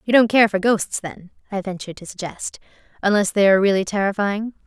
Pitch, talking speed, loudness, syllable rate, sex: 200 Hz, 195 wpm, -20 LUFS, 6.0 syllables/s, female